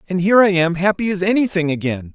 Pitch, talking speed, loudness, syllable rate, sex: 180 Hz, 225 wpm, -17 LUFS, 6.6 syllables/s, male